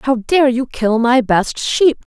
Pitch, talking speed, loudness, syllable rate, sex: 250 Hz, 195 wpm, -15 LUFS, 3.5 syllables/s, female